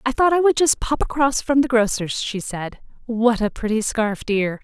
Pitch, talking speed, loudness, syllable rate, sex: 235 Hz, 220 wpm, -20 LUFS, 4.7 syllables/s, female